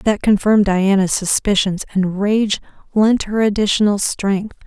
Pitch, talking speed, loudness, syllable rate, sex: 200 Hz, 130 wpm, -16 LUFS, 4.3 syllables/s, female